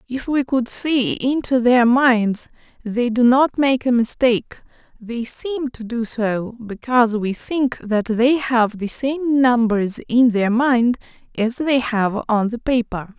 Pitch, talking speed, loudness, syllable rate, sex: 240 Hz, 165 wpm, -18 LUFS, 3.7 syllables/s, female